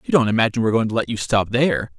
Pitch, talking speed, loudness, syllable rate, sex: 115 Hz, 300 wpm, -19 LUFS, 8.1 syllables/s, male